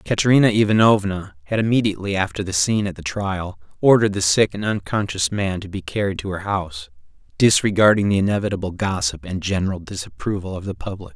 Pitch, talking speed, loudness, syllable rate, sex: 95 Hz, 170 wpm, -20 LUFS, 6.2 syllables/s, male